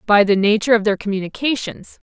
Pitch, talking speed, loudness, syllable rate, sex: 210 Hz, 170 wpm, -17 LUFS, 6.4 syllables/s, female